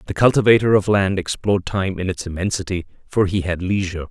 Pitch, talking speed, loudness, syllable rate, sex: 95 Hz, 190 wpm, -19 LUFS, 6.2 syllables/s, male